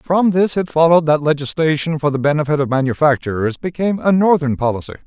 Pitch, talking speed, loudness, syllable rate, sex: 155 Hz, 180 wpm, -16 LUFS, 6.3 syllables/s, male